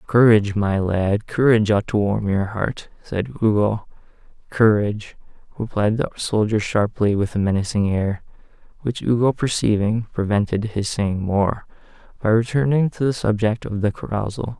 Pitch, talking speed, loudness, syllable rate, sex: 110 Hz, 145 wpm, -20 LUFS, 4.7 syllables/s, male